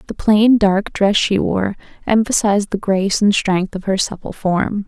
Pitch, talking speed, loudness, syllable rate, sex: 200 Hz, 185 wpm, -16 LUFS, 4.6 syllables/s, female